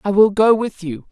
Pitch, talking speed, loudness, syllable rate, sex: 195 Hz, 270 wpm, -16 LUFS, 5.0 syllables/s, female